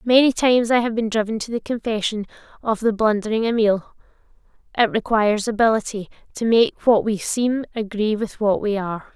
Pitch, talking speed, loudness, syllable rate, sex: 220 Hz, 170 wpm, -20 LUFS, 5.4 syllables/s, female